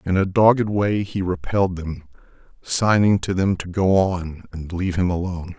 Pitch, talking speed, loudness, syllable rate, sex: 90 Hz, 185 wpm, -20 LUFS, 5.0 syllables/s, male